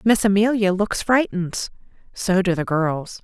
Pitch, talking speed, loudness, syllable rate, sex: 195 Hz, 150 wpm, -20 LUFS, 4.5 syllables/s, female